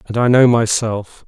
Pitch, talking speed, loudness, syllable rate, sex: 115 Hz, 190 wpm, -14 LUFS, 4.4 syllables/s, male